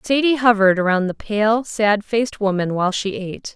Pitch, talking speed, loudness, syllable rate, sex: 210 Hz, 185 wpm, -18 LUFS, 5.5 syllables/s, female